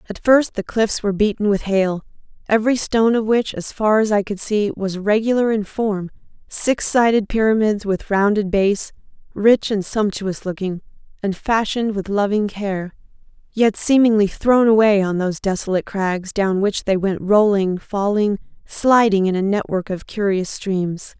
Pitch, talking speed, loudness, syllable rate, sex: 205 Hz, 165 wpm, -18 LUFS, 4.7 syllables/s, female